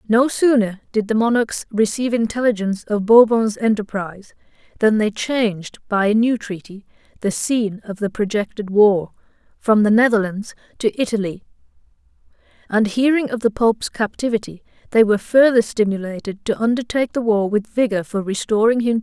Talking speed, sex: 155 wpm, female